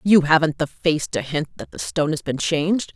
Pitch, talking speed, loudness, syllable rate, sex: 160 Hz, 245 wpm, -21 LUFS, 5.4 syllables/s, female